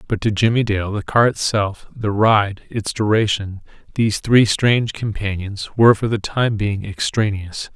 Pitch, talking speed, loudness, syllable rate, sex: 105 Hz, 165 wpm, -18 LUFS, 4.5 syllables/s, male